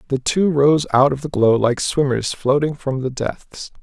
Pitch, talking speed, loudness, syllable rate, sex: 140 Hz, 205 wpm, -18 LUFS, 4.3 syllables/s, male